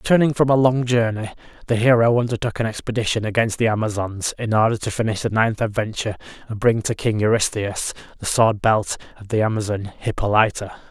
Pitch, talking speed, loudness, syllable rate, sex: 110 Hz, 175 wpm, -20 LUFS, 5.9 syllables/s, male